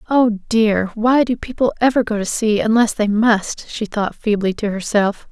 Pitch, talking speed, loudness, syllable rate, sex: 220 Hz, 190 wpm, -17 LUFS, 4.4 syllables/s, female